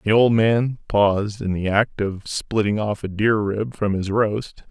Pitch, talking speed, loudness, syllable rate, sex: 105 Hz, 205 wpm, -21 LUFS, 4.1 syllables/s, male